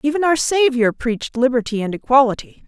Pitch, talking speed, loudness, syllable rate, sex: 260 Hz, 155 wpm, -17 LUFS, 5.9 syllables/s, female